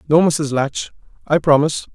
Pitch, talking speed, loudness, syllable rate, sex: 150 Hz, 155 wpm, -17 LUFS, 5.2 syllables/s, male